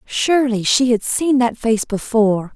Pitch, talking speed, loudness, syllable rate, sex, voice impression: 235 Hz, 165 wpm, -17 LUFS, 4.5 syllables/s, female, feminine, middle-aged, slightly relaxed, powerful, slightly raspy, intellectual, slightly strict, slightly intense, sharp